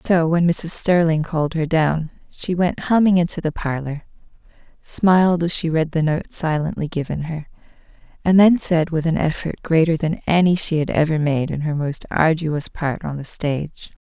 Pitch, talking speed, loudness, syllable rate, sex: 160 Hz, 185 wpm, -19 LUFS, 4.8 syllables/s, female